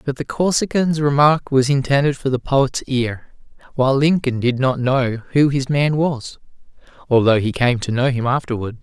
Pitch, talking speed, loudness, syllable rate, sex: 135 Hz, 175 wpm, -18 LUFS, 4.8 syllables/s, male